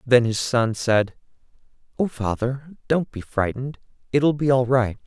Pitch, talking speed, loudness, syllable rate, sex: 125 Hz, 165 wpm, -22 LUFS, 4.9 syllables/s, male